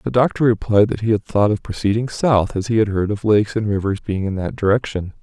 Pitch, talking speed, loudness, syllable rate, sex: 105 Hz, 255 wpm, -18 LUFS, 5.9 syllables/s, male